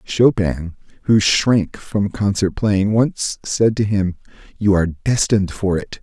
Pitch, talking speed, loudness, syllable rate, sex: 100 Hz, 150 wpm, -18 LUFS, 3.9 syllables/s, male